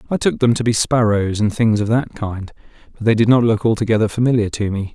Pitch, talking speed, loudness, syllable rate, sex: 110 Hz, 245 wpm, -17 LUFS, 6.0 syllables/s, male